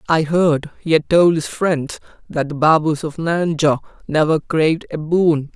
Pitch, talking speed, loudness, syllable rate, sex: 155 Hz, 175 wpm, -17 LUFS, 4.5 syllables/s, male